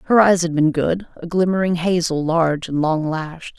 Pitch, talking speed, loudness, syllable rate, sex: 170 Hz, 185 wpm, -19 LUFS, 4.8 syllables/s, female